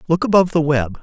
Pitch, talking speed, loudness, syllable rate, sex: 160 Hz, 235 wpm, -16 LUFS, 6.9 syllables/s, male